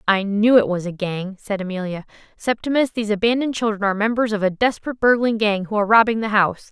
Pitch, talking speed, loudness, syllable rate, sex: 210 Hz, 215 wpm, -19 LUFS, 6.7 syllables/s, female